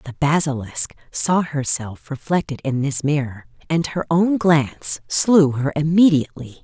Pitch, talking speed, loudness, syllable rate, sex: 150 Hz, 135 wpm, -19 LUFS, 4.4 syllables/s, female